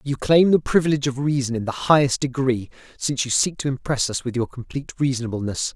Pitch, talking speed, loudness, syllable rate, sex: 135 Hz, 210 wpm, -21 LUFS, 6.4 syllables/s, male